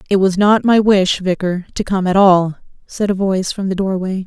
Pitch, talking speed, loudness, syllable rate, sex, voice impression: 190 Hz, 225 wpm, -15 LUFS, 5.1 syllables/s, female, feminine, adult-like, slightly soft, calm, sweet, slightly kind